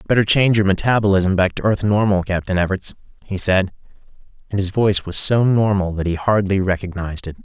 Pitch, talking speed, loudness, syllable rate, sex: 95 Hz, 185 wpm, -18 LUFS, 6.0 syllables/s, male